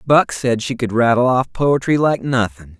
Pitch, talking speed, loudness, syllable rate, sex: 120 Hz, 195 wpm, -17 LUFS, 4.5 syllables/s, male